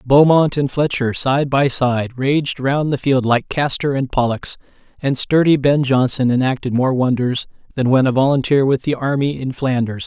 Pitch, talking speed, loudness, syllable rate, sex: 135 Hz, 180 wpm, -17 LUFS, 4.7 syllables/s, male